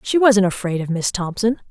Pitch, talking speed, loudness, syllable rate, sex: 205 Hz, 210 wpm, -19 LUFS, 5.2 syllables/s, female